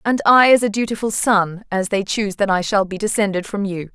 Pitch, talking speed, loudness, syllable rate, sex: 205 Hz, 245 wpm, -18 LUFS, 5.6 syllables/s, female